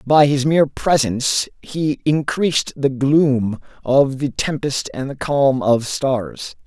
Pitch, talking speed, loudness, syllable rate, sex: 135 Hz, 145 wpm, -18 LUFS, 3.6 syllables/s, male